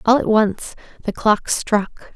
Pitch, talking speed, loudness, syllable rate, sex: 215 Hz, 165 wpm, -18 LUFS, 3.5 syllables/s, female